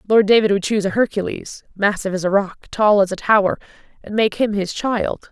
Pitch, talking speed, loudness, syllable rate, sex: 200 Hz, 190 wpm, -18 LUFS, 5.7 syllables/s, female